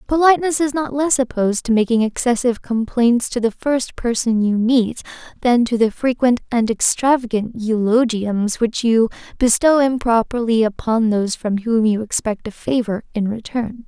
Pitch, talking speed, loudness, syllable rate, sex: 235 Hz, 155 wpm, -18 LUFS, 4.8 syllables/s, female